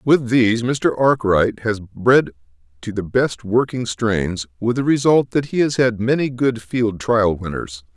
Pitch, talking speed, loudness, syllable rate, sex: 115 Hz, 175 wpm, -18 LUFS, 4.1 syllables/s, male